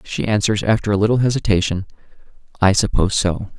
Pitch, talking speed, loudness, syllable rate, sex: 100 Hz, 150 wpm, -18 LUFS, 6.3 syllables/s, male